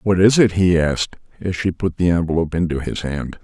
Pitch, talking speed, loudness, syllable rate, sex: 85 Hz, 225 wpm, -19 LUFS, 5.7 syllables/s, male